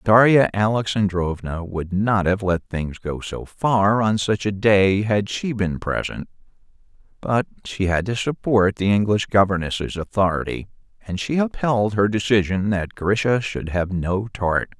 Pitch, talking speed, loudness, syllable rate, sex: 100 Hz, 155 wpm, -21 LUFS, 4.2 syllables/s, male